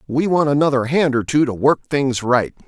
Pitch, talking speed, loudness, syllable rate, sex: 135 Hz, 225 wpm, -17 LUFS, 5.2 syllables/s, male